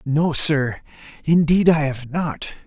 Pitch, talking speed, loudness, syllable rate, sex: 150 Hz, 135 wpm, -19 LUFS, 3.4 syllables/s, male